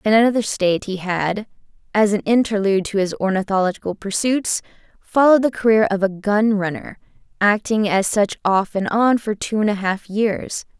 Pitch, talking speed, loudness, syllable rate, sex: 205 Hz, 170 wpm, -19 LUFS, 5.2 syllables/s, female